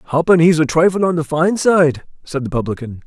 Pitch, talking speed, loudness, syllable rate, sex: 155 Hz, 215 wpm, -15 LUFS, 5.7 syllables/s, male